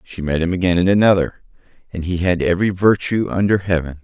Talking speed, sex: 180 wpm, male